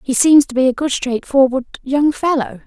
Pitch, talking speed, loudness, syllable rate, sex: 265 Hz, 225 wpm, -15 LUFS, 5.1 syllables/s, female